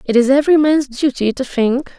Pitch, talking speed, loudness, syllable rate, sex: 270 Hz, 210 wpm, -15 LUFS, 5.5 syllables/s, female